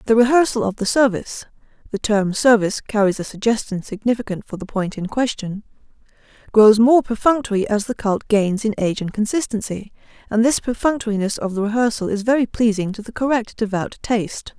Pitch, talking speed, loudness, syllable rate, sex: 220 Hz, 175 wpm, -19 LUFS, 4.4 syllables/s, female